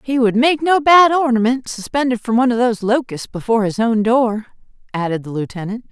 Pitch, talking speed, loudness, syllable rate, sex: 235 Hz, 195 wpm, -16 LUFS, 5.8 syllables/s, female